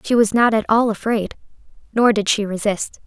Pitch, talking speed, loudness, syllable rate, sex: 215 Hz, 195 wpm, -18 LUFS, 5.1 syllables/s, female